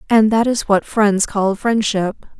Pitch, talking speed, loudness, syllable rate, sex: 210 Hz, 175 wpm, -16 LUFS, 3.8 syllables/s, female